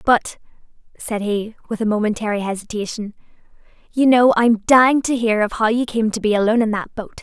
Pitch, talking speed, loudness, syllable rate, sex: 220 Hz, 190 wpm, -18 LUFS, 5.7 syllables/s, female